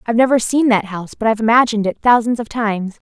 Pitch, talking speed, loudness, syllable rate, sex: 225 Hz, 230 wpm, -16 LUFS, 7.3 syllables/s, female